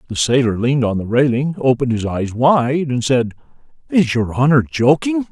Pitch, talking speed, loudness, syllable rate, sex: 130 Hz, 180 wpm, -16 LUFS, 5.2 syllables/s, male